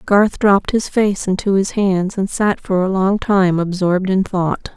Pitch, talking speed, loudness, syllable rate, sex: 195 Hz, 200 wpm, -16 LUFS, 4.3 syllables/s, female